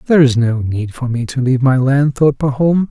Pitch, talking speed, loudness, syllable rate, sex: 135 Hz, 225 wpm, -14 LUFS, 5.1 syllables/s, male